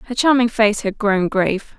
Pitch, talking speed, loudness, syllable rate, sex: 220 Hz, 200 wpm, -17 LUFS, 5.2 syllables/s, female